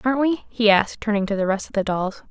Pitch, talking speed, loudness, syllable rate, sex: 215 Hz, 285 wpm, -21 LUFS, 6.6 syllables/s, female